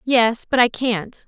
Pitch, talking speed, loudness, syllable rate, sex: 235 Hz, 190 wpm, -19 LUFS, 3.6 syllables/s, female